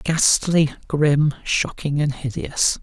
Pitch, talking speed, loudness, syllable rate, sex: 150 Hz, 105 wpm, -20 LUFS, 3.2 syllables/s, male